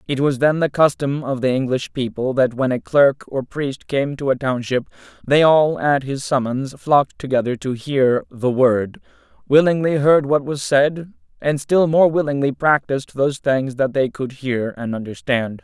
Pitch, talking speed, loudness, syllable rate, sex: 135 Hz, 185 wpm, -19 LUFS, 4.6 syllables/s, male